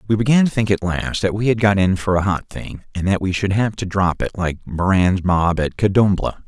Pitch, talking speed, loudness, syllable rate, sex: 95 Hz, 260 wpm, -18 LUFS, 5.3 syllables/s, male